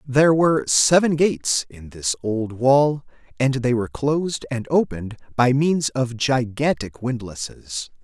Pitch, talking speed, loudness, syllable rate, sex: 125 Hz, 140 wpm, -20 LUFS, 4.4 syllables/s, male